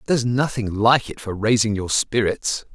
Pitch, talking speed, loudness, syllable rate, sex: 115 Hz, 175 wpm, -20 LUFS, 4.8 syllables/s, male